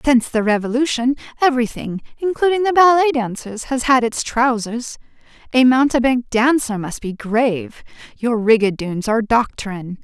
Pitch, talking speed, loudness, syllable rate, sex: 245 Hz, 130 wpm, -17 LUFS, 5.2 syllables/s, female